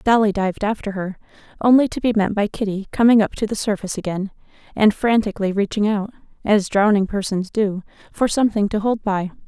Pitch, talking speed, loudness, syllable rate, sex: 205 Hz, 185 wpm, -19 LUFS, 5.9 syllables/s, female